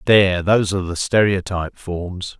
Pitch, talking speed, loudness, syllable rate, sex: 95 Hz, 150 wpm, -19 LUFS, 5.4 syllables/s, male